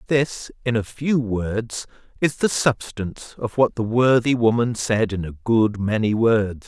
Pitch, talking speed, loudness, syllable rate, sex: 115 Hz, 170 wpm, -21 LUFS, 4.0 syllables/s, male